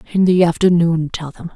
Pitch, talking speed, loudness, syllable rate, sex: 170 Hz, 195 wpm, -15 LUFS, 5.5 syllables/s, female